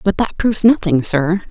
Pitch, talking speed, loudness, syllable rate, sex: 190 Hz, 200 wpm, -15 LUFS, 5.1 syllables/s, female